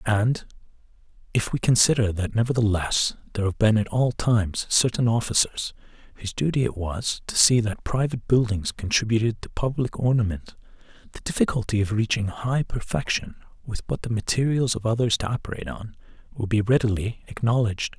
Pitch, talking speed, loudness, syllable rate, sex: 110 Hz, 155 wpm, -24 LUFS, 5.6 syllables/s, male